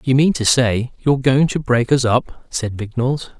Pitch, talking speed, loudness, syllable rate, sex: 125 Hz, 210 wpm, -17 LUFS, 4.8 syllables/s, male